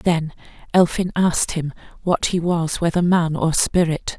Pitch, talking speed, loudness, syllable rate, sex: 170 Hz, 160 wpm, -20 LUFS, 4.4 syllables/s, female